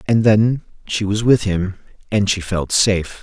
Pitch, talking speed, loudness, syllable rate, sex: 100 Hz, 185 wpm, -17 LUFS, 4.3 syllables/s, male